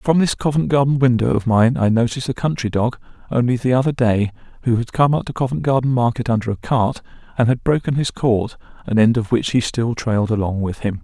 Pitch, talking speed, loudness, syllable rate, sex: 120 Hz, 230 wpm, -18 LUFS, 5.9 syllables/s, male